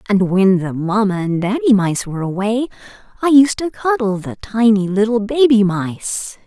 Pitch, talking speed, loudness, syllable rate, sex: 210 Hz, 165 wpm, -16 LUFS, 4.6 syllables/s, female